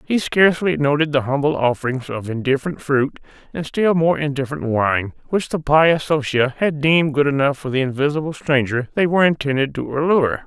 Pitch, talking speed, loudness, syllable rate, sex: 145 Hz, 180 wpm, -18 LUFS, 5.6 syllables/s, male